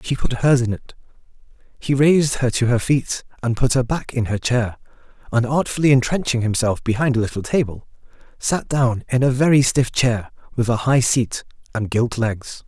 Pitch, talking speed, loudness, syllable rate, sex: 125 Hz, 190 wpm, -19 LUFS, 5.0 syllables/s, male